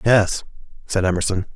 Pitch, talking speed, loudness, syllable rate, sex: 95 Hz, 115 wpm, -21 LUFS, 5.2 syllables/s, male